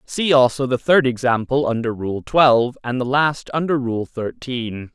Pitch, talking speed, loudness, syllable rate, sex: 130 Hz, 170 wpm, -19 LUFS, 4.4 syllables/s, male